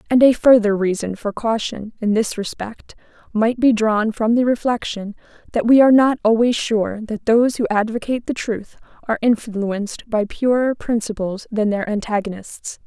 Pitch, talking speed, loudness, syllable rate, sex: 220 Hz, 165 wpm, -18 LUFS, 4.9 syllables/s, female